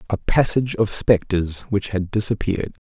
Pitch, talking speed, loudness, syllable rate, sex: 100 Hz, 145 wpm, -21 LUFS, 5.1 syllables/s, male